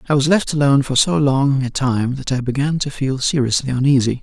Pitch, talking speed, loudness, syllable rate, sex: 135 Hz, 225 wpm, -17 LUFS, 5.7 syllables/s, male